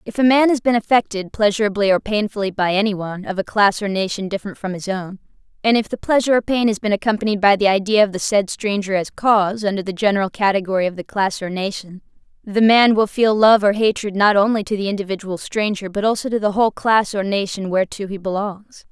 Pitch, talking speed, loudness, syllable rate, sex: 205 Hz, 225 wpm, -18 LUFS, 6.2 syllables/s, female